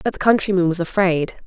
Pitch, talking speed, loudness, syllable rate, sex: 185 Hz, 205 wpm, -18 LUFS, 6.2 syllables/s, female